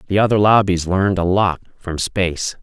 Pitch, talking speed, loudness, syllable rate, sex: 95 Hz, 185 wpm, -17 LUFS, 5.3 syllables/s, male